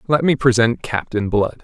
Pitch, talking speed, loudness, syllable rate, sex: 120 Hz, 185 wpm, -18 LUFS, 4.6 syllables/s, male